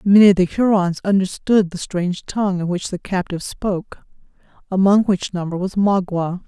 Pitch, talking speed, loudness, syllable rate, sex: 190 Hz, 165 wpm, -19 LUFS, 5.4 syllables/s, female